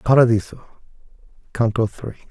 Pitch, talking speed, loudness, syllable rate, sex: 115 Hz, 80 wpm, -19 LUFS, 5.7 syllables/s, male